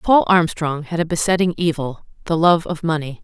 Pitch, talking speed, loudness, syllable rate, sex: 165 Hz, 165 wpm, -18 LUFS, 5.2 syllables/s, female